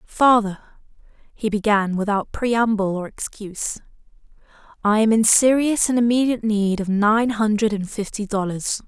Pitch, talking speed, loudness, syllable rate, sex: 215 Hz, 135 wpm, -20 LUFS, 4.7 syllables/s, female